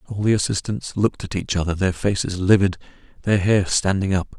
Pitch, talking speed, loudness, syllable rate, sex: 95 Hz, 190 wpm, -21 LUFS, 5.8 syllables/s, male